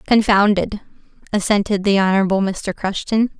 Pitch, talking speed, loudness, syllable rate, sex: 200 Hz, 105 wpm, -18 LUFS, 5.3 syllables/s, female